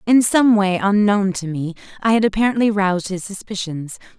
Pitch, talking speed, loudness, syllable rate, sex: 200 Hz, 170 wpm, -18 LUFS, 5.3 syllables/s, female